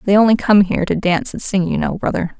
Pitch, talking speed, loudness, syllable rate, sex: 190 Hz, 275 wpm, -16 LUFS, 6.7 syllables/s, female